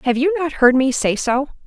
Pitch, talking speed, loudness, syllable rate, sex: 265 Hz, 250 wpm, -17 LUFS, 5.2 syllables/s, female